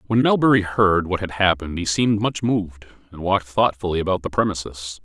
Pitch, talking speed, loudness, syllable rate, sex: 95 Hz, 190 wpm, -20 LUFS, 6.1 syllables/s, male